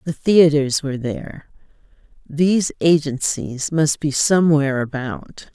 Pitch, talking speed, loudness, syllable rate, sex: 150 Hz, 95 wpm, -18 LUFS, 4.3 syllables/s, female